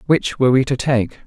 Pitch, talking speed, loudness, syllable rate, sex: 130 Hz, 240 wpm, -17 LUFS, 5.9 syllables/s, male